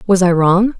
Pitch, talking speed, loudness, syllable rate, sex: 190 Hz, 225 wpm, -13 LUFS, 4.6 syllables/s, female